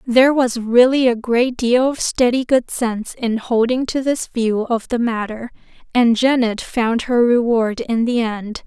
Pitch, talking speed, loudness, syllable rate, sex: 240 Hz, 180 wpm, -17 LUFS, 4.2 syllables/s, female